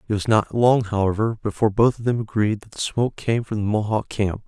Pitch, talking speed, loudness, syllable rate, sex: 110 Hz, 240 wpm, -21 LUFS, 5.9 syllables/s, male